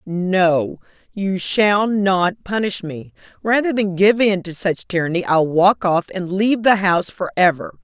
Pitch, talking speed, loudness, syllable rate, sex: 190 Hz, 170 wpm, -18 LUFS, 4.2 syllables/s, female